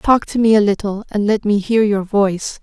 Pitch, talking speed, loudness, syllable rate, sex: 210 Hz, 250 wpm, -16 LUFS, 5.1 syllables/s, female